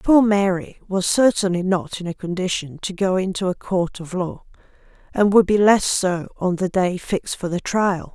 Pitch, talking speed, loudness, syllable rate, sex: 190 Hz, 200 wpm, -20 LUFS, 4.7 syllables/s, female